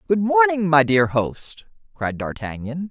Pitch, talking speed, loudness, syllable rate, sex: 150 Hz, 145 wpm, -20 LUFS, 4.1 syllables/s, male